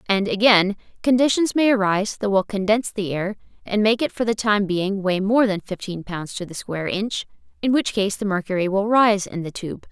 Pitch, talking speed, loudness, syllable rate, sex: 205 Hz, 220 wpm, -21 LUFS, 5.4 syllables/s, female